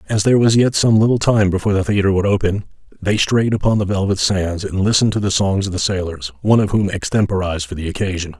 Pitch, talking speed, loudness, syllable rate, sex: 100 Hz, 235 wpm, -17 LUFS, 6.6 syllables/s, male